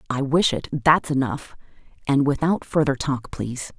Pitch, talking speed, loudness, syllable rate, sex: 140 Hz, 160 wpm, -22 LUFS, 4.7 syllables/s, female